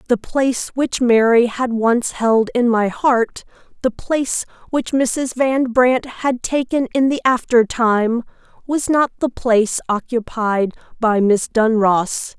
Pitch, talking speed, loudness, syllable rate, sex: 240 Hz, 145 wpm, -17 LUFS, 3.8 syllables/s, female